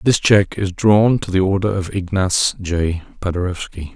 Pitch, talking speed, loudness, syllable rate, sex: 95 Hz, 165 wpm, -17 LUFS, 4.6 syllables/s, male